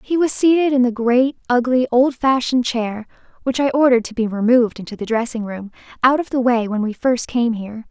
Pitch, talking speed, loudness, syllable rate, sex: 245 Hz, 215 wpm, -18 LUFS, 5.7 syllables/s, female